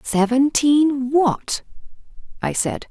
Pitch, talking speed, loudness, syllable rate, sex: 265 Hz, 85 wpm, -19 LUFS, 2.9 syllables/s, female